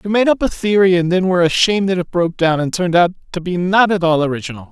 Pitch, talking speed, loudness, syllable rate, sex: 180 Hz, 280 wpm, -15 LUFS, 7.1 syllables/s, male